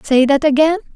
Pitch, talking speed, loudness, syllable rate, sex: 295 Hz, 190 wpm, -14 LUFS, 5.6 syllables/s, female